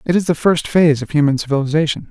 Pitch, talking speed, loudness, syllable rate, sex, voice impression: 150 Hz, 230 wpm, -16 LUFS, 7.0 syllables/s, male, very masculine, middle-aged, thick, tensed, powerful, slightly bright, slightly hard, clear, very fluent, cool, intellectual, refreshing, slightly sincere, calm, friendly, reassuring, slightly unique, slightly elegant, wild, slightly sweet, slightly lively, kind, modest